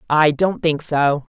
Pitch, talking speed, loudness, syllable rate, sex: 150 Hz, 180 wpm, -18 LUFS, 3.6 syllables/s, female